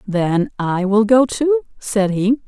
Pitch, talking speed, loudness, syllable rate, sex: 220 Hz, 170 wpm, -17 LUFS, 3.7 syllables/s, female